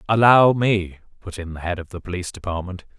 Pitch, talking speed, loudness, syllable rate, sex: 95 Hz, 200 wpm, -20 LUFS, 6.0 syllables/s, male